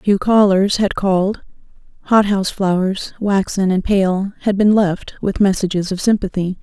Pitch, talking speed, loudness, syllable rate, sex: 195 Hz, 155 wpm, -16 LUFS, 4.8 syllables/s, female